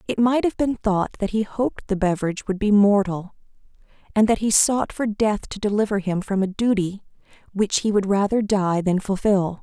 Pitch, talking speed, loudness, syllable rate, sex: 205 Hz, 200 wpm, -21 LUFS, 5.3 syllables/s, female